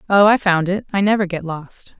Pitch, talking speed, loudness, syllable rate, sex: 190 Hz, 240 wpm, -17 LUFS, 5.3 syllables/s, female